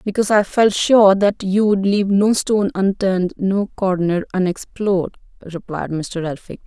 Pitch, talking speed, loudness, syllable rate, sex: 195 Hz, 155 wpm, -17 LUFS, 4.9 syllables/s, female